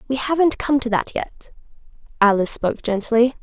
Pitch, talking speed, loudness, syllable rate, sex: 240 Hz, 160 wpm, -19 LUFS, 5.5 syllables/s, female